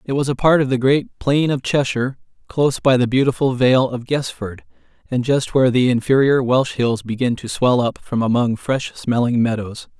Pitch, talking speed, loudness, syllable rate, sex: 130 Hz, 200 wpm, -18 LUFS, 5.1 syllables/s, male